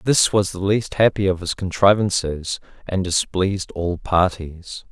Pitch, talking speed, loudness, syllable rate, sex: 95 Hz, 145 wpm, -20 LUFS, 4.1 syllables/s, male